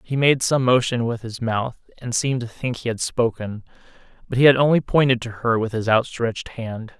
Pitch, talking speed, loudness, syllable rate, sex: 120 Hz, 215 wpm, -21 LUFS, 5.2 syllables/s, male